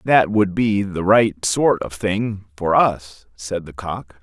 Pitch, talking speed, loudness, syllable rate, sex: 95 Hz, 185 wpm, -19 LUFS, 3.4 syllables/s, male